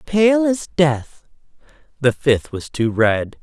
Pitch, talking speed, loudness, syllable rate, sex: 140 Hz, 140 wpm, -18 LUFS, 3.1 syllables/s, male